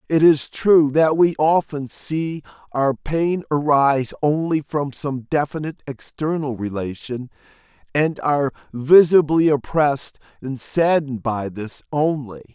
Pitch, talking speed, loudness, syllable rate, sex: 145 Hz, 120 wpm, -20 LUFS, 4.1 syllables/s, male